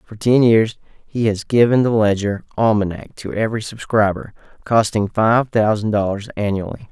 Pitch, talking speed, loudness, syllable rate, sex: 110 Hz, 150 wpm, -18 LUFS, 4.9 syllables/s, male